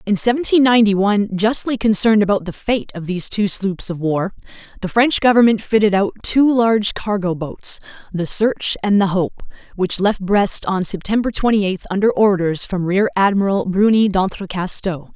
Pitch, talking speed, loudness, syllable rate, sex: 200 Hz, 170 wpm, -17 LUFS, 5.1 syllables/s, female